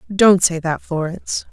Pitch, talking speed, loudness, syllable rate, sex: 175 Hz, 160 wpm, -17 LUFS, 4.7 syllables/s, female